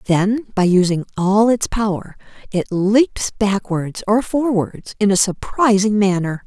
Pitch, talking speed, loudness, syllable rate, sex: 205 Hz, 140 wpm, -17 LUFS, 4.0 syllables/s, female